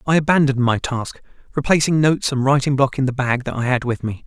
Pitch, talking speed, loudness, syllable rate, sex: 135 Hz, 240 wpm, -18 LUFS, 6.3 syllables/s, male